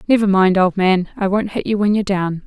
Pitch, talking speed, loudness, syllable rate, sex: 195 Hz, 270 wpm, -16 LUFS, 5.9 syllables/s, female